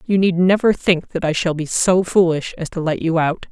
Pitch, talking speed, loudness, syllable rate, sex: 175 Hz, 255 wpm, -18 LUFS, 5.1 syllables/s, female